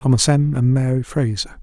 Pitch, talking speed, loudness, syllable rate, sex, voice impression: 130 Hz, 185 wpm, -18 LUFS, 5.0 syllables/s, male, very masculine, very adult-like, slightly middle-aged, very thick, relaxed, weak, slightly dark, very soft, slightly muffled, slightly halting, slightly raspy, slightly cool, intellectual, very sincere, very calm, very mature, slightly friendly, very unique, slightly wild, sweet, slightly kind, modest